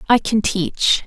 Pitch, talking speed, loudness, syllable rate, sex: 210 Hz, 170 wpm, -18 LUFS, 3.4 syllables/s, female